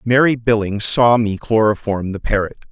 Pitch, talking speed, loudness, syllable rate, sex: 110 Hz, 155 wpm, -17 LUFS, 4.8 syllables/s, male